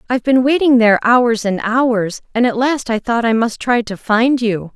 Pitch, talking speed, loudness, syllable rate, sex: 235 Hz, 225 wpm, -15 LUFS, 4.8 syllables/s, female